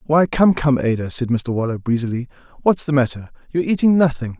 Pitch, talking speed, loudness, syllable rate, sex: 135 Hz, 190 wpm, -19 LUFS, 5.9 syllables/s, male